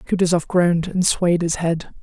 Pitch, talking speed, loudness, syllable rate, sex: 175 Hz, 180 wpm, -19 LUFS, 4.9 syllables/s, female